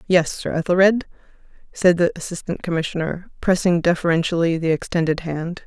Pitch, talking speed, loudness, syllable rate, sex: 170 Hz, 125 wpm, -20 LUFS, 5.5 syllables/s, female